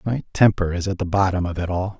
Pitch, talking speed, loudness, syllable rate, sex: 95 Hz, 270 wpm, -21 LUFS, 6.2 syllables/s, male